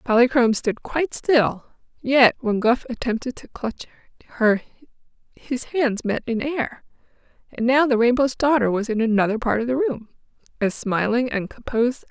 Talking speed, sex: 170 wpm, female